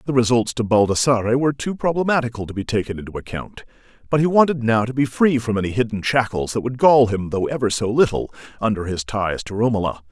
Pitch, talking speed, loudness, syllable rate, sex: 120 Hz, 215 wpm, -20 LUFS, 6.3 syllables/s, male